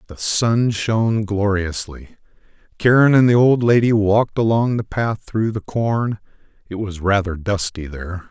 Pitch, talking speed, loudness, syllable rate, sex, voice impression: 105 Hz, 150 wpm, -18 LUFS, 4.5 syllables/s, male, very masculine, middle-aged, slightly thick, slightly muffled, slightly intellectual, slightly calm